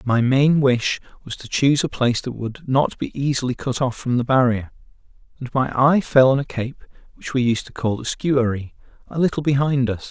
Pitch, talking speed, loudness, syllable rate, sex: 130 Hz, 215 wpm, -20 LUFS, 5.2 syllables/s, male